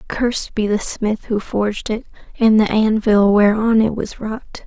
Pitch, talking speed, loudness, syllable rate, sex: 215 Hz, 180 wpm, -17 LUFS, 4.3 syllables/s, female